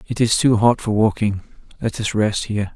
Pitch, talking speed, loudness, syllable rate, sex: 110 Hz, 220 wpm, -19 LUFS, 5.3 syllables/s, male